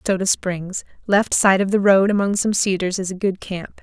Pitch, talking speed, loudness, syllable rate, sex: 195 Hz, 205 wpm, -19 LUFS, 4.9 syllables/s, female